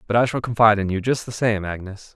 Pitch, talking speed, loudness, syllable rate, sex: 110 Hz, 280 wpm, -20 LUFS, 6.5 syllables/s, male